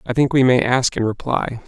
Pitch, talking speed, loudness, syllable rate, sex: 125 Hz, 250 wpm, -18 LUFS, 5.3 syllables/s, male